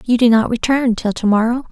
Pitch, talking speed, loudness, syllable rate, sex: 235 Hz, 245 wpm, -15 LUFS, 5.7 syllables/s, female